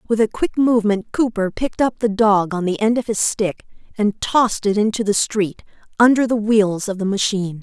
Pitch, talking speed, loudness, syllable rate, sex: 210 Hz, 215 wpm, -18 LUFS, 5.3 syllables/s, female